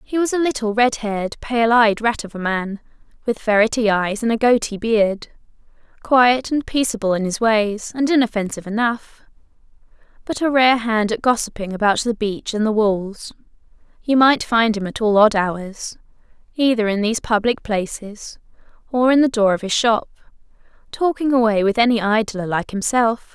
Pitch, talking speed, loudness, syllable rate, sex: 225 Hz, 170 wpm, -18 LUFS, 4.9 syllables/s, female